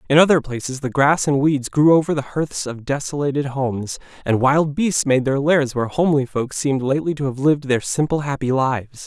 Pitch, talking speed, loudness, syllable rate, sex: 140 Hz, 210 wpm, -19 LUFS, 5.7 syllables/s, male